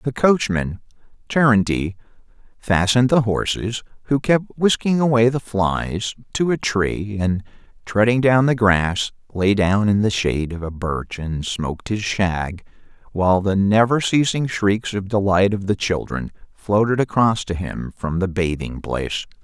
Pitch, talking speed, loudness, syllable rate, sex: 105 Hz, 155 wpm, -20 LUFS, 4.3 syllables/s, male